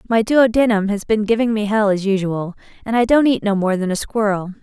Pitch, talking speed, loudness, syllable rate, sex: 210 Hz, 245 wpm, -17 LUFS, 5.7 syllables/s, female